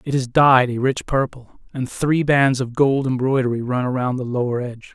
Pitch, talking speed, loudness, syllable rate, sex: 130 Hz, 205 wpm, -19 LUFS, 4.9 syllables/s, male